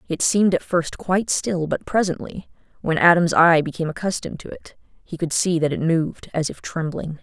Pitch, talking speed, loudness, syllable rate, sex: 170 Hz, 200 wpm, -21 LUFS, 5.6 syllables/s, female